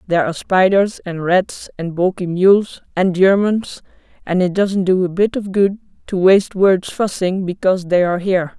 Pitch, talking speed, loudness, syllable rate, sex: 185 Hz, 180 wpm, -16 LUFS, 4.9 syllables/s, female